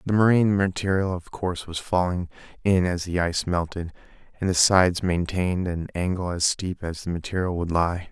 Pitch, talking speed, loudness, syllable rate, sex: 90 Hz, 185 wpm, -24 LUFS, 5.5 syllables/s, male